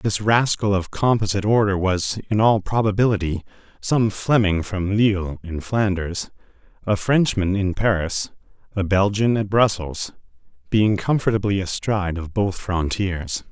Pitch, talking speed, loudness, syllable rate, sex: 100 Hz, 130 wpm, -21 LUFS, 4.5 syllables/s, male